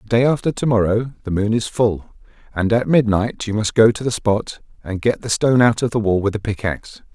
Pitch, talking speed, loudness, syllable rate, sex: 110 Hz, 245 wpm, -18 LUFS, 5.6 syllables/s, male